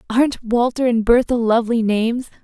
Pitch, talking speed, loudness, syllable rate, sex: 235 Hz, 150 wpm, -17 LUFS, 5.6 syllables/s, female